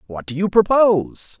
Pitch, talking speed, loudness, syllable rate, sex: 180 Hz, 170 wpm, -16 LUFS, 4.9 syllables/s, male